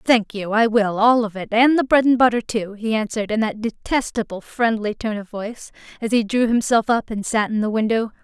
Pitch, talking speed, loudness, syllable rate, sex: 225 Hz, 235 wpm, -20 LUFS, 5.4 syllables/s, female